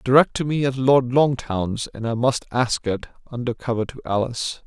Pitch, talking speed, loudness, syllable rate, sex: 125 Hz, 195 wpm, -22 LUFS, 5.0 syllables/s, male